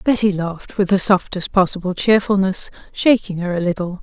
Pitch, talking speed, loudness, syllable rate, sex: 190 Hz, 165 wpm, -18 LUFS, 5.4 syllables/s, female